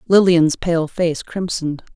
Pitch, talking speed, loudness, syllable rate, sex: 170 Hz, 125 wpm, -18 LUFS, 4.2 syllables/s, female